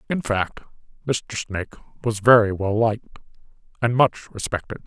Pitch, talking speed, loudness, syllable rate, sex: 110 Hz, 135 wpm, -22 LUFS, 4.8 syllables/s, male